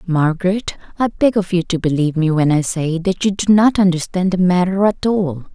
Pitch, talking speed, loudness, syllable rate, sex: 180 Hz, 215 wpm, -16 LUFS, 5.3 syllables/s, female